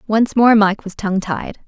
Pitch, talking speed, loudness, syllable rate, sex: 205 Hz, 215 wpm, -16 LUFS, 4.9 syllables/s, female